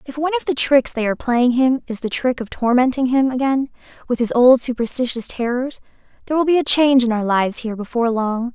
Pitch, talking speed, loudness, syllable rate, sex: 250 Hz, 225 wpm, -18 LUFS, 6.3 syllables/s, female